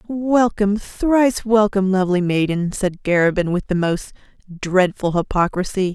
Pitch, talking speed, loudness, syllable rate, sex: 195 Hz, 120 wpm, -18 LUFS, 4.8 syllables/s, female